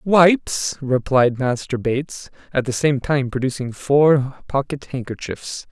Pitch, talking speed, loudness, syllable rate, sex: 135 Hz, 125 wpm, -20 LUFS, 4.0 syllables/s, male